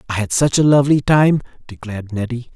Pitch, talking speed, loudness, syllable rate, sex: 125 Hz, 190 wpm, -16 LUFS, 6.2 syllables/s, male